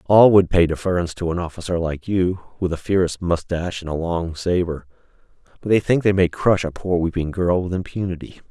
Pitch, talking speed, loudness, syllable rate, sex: 90 Hz, 205 wpm, -20 LUFS, 5.6 syllables/s, male